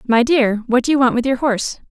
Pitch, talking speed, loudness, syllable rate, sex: 250 Hz, 285 wpm, -16 LUFS, 6.0 syllables/s, female